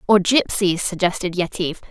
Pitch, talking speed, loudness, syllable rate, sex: 185 Hz, 125 wpm, -19 LUFS, 5.3 syllables/s, female